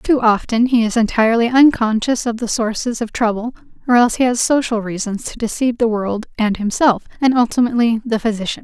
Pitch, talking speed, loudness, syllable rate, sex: 230 Hz, 190 wpm, -16 LUFS, 5.9 syllables/s, female